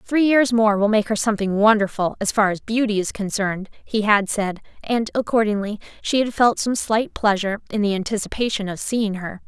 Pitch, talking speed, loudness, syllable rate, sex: 210 Hz, 195 wpm, -20 LUFS, 5.4 syllables/s, female